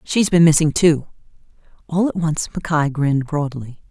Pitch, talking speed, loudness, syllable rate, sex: 155 Hz, 155 wpm, -18 LUFS, 5.1 syllables/s, female